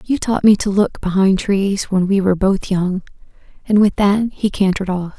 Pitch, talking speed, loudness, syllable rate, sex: 195 Hz, 210 wpm, -16 LUFS, 5.0 syllables/s, female